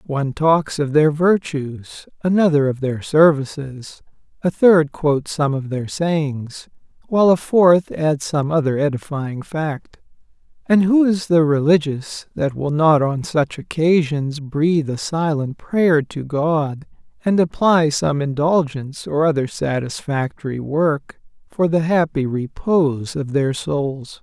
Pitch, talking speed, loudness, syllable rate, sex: 150 Hz, 140 wpm, -18 LUFS, 3.9 syllables/s, male